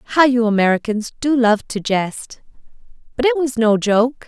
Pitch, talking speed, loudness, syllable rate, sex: 230 Hz, 170 wpm, -17 LUFS, 4.4 syllables/s, female